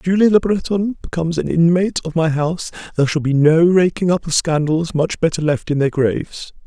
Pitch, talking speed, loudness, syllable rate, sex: 160 Hz, 215 wpm, -17 LUFS, 5.8 syllables/s, male